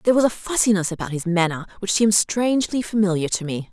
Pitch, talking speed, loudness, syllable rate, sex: 200 Hz, 210 wpm, -21 LUFS, 6.5 syllables/s, female